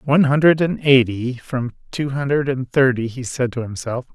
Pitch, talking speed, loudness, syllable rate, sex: 130 Hz, 190 wpm, -19 LUFS, 4.9 syllables/s, male